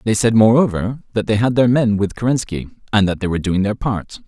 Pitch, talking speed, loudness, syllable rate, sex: 110 Hz, 240 wpm, -17 LUFS, 5.9 syllables/s, male